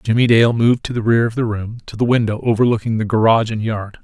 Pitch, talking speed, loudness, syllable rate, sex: 115 Hz, 240 wpm, -16 LUFS, 6.4 syllables/s, male